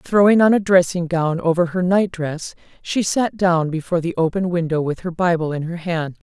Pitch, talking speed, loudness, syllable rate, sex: 175 Hz, 210 wpm, -19 LUFS, 5.1 syllables/s, female